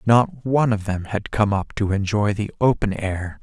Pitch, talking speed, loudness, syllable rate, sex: 105 Hz, 210 wpm, -21 LUFS, 4.6 syllables/s, male